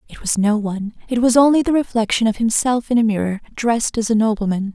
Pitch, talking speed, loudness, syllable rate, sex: 225 Hz, 230 wpm, -18 LUFS, 6.3 syllables/s, female